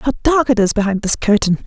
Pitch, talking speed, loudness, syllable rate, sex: 225 Hz, 255 wpm, -15 LUFS, 5.5 syllables/s, female